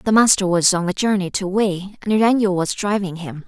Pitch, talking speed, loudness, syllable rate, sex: 195 Hz, 240 wpm, -18 LUFS, 5.0 syllables/s, female